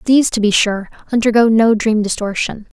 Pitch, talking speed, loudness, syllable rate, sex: 220 Hz, 170 wpm, -15 LUFS, 5.5 syllables/s, female